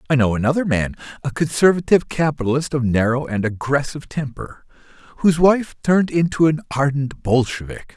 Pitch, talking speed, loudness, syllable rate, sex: 140 Hz, 145 wpm, -19 LUFS, 5.8 syllables/s, male